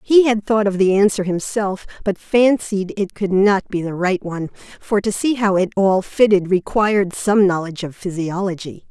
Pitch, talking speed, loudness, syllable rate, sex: 200 Hz, 190 wpm, -18 LUFS, 4.9 syllables/s, female